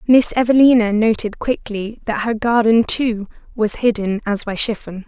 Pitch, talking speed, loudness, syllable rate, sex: 220 Hz, 155 wpm, -17 LUFS, 4.7 syllables/s, female